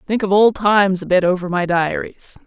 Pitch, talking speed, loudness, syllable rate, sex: 190 Hz, 220 wpm, -16 LUFS, 5.2 syllables/s, female